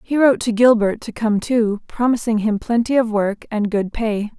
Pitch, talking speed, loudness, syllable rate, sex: 225 Hz, 205 wpm, -18 LUFS, 4.8 syllables/s, female